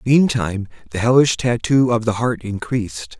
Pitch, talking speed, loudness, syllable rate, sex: 115 Hz, 150 wpm, -18 LUFS, 5.0 syllables/s, male